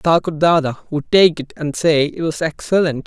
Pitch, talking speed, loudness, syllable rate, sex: 160 Hz, 195 wpm, -17 LUFS, 4.9 syllables/s, male